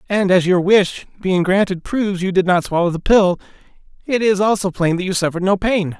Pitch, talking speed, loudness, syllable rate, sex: 190 Hz, 220 wpm, -17 LUFS, 5.6 syllables/s, male